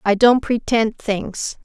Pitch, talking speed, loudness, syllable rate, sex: 220 Hz, 145 wpm, -18 LUFS, 3.4 syllables/s, female